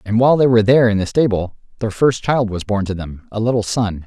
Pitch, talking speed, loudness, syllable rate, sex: 110 Hz, 265 wpm, -17 LUFS, 6.3 syllables/s, male